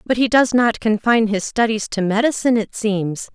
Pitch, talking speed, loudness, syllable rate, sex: 220 Hz, 195 wpm, -18 LUFS, 5.3 syllables/s, female